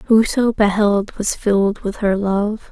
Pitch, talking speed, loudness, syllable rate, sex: 205 Hz, 155 wpm, -17 LUFS, 3.8 syllables/s, female